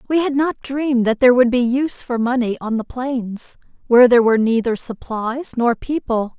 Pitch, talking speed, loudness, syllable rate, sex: 245 Hz, 195 wpm, -17 LUFS, 5.3 syllables/s, female